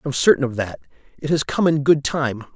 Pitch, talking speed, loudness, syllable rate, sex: 140 Hz, 235 wpm, -20 LUFS, 5.6 syllables/s, male